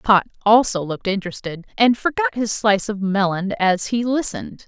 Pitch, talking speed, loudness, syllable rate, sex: 210 Hz, 165 wpm, -19 LUFS, 5.3 syllables/s, female